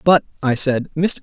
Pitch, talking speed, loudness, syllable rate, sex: 150 Hz, 195 wpm, -18 LUFS, 4.7 syllables/s, male